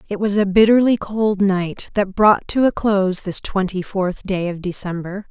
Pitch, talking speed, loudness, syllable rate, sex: 195 Hz, 190 wpm, -18 LUFS, 4.5 syllables/s, female